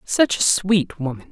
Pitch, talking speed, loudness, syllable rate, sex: 170 Hz, 180 wpm, -19 LUFS, 4.2 syllables/s, male